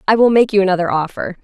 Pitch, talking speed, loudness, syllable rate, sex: 200 Hz, 250 wpm, -15 LUFS, 7.1 syllables/s, female